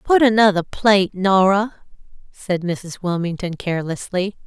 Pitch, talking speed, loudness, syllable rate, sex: 190 Hz, 110 wpm, -19 LUFS, 4.5 syllables/s, female